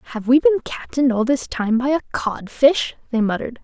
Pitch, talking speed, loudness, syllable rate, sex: 255 Hz, 200 wpm, -19 LUFS, 5.6 syllables/s, female